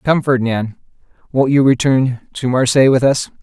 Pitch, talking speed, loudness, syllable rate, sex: 130 Hz, 160 wpm, -15 LUFS, 4.9 syllables/s, male